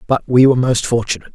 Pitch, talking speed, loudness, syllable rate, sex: 120 Hz, 225 wpm, -14 LUFS, 8.0 syllables/s, male